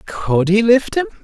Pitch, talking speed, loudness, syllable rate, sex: 220 Hz, 195 wpm, -15 LUFS, 4.2 syllables/s, male